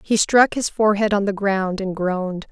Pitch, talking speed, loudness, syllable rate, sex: 200 Hz, 215 wpm, -19 LUFS, 5.0 syllables/s, female